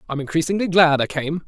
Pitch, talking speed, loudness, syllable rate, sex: 160 Hz, 205 wpm, -19 LUFS, 6.3 syllables/s, male